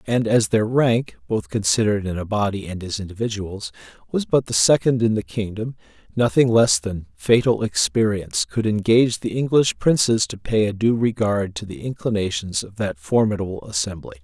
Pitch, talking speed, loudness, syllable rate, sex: 110 Hz, 175 wpm, -21 LUFS, 5.2 syllables/s, male